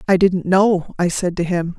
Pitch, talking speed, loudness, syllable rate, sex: 180 Hz, 235 wpm, -18 LUFS, 4.5 syllables/s, female